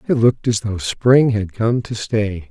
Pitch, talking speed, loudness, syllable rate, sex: 110 Hz, 215 wpm, -18 LUFS, 4.4 syllables/s, male